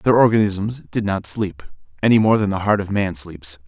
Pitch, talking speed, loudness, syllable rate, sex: 100 Hz, 210 wpm, -19 LUFS, 5.0 syllables/s, male